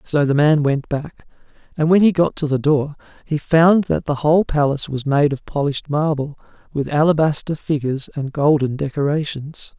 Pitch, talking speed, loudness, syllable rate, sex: 150 Hz, 180 wpm, -18 LUFS, 5.2 syllables/s, male